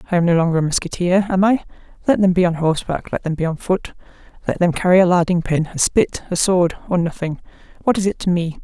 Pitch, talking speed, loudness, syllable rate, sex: 175 Hz, 235 wpm, -18 LUFS, 6.4 syllables/s, female